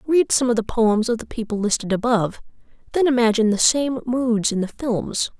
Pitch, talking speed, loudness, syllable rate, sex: 230 Hz, 200 wpm, -20 LUFS, 5.4 syllables/s, female